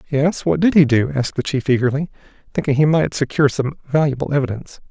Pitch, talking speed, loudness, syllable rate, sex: 135 Hz, 195 wpm, -18 LUFS, 6.6 syllables/s, male